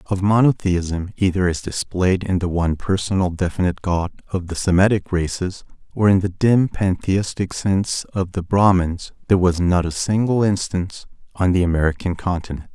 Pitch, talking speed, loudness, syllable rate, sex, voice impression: 95 Hz, 160 wpm, -20 LUFS, 5.1 syllables/s, male, masculine, middle-aged, thick, tensed, soft, muffled, cool, calm, reassuring, wild, kind, modest